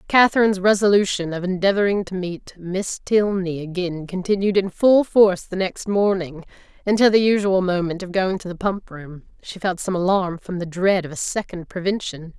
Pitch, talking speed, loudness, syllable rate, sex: 185 Hz, 185 wpm, -20 LUFS, 5.1 syllables/s, female